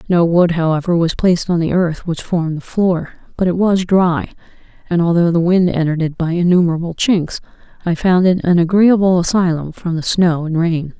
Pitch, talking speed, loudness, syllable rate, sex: 175 Hz, 195 wpm, -15 LUFS, 5.4 syllables/s, female